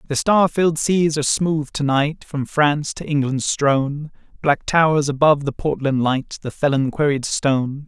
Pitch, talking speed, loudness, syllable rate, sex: 145 Hz, 175 wpm, -19 LUFS, 4.7 syllables/s, male